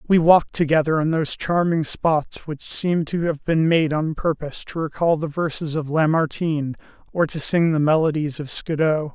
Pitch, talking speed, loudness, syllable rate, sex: 155 Hz, 185 wpm, -21 LUFS, 5.1 syllables/s, male